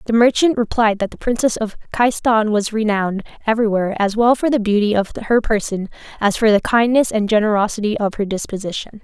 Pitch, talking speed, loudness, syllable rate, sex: 215 Hz, 185 wpm, -17 LUFS, 6.0 syllables/s, female